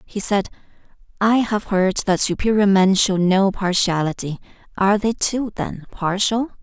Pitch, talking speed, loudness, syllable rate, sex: 200 Hz, 145 wpm, -19 LUFS, 4.4 syllables/s, female